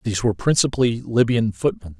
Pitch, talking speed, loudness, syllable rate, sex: 115 Hz, 150 wpm, -20 LUFS, 6.5 syllables/s, male